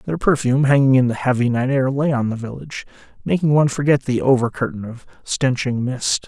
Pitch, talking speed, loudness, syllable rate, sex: 130 Hz, 200 wpm, -18 LUFS, 5.8 syllables/s, male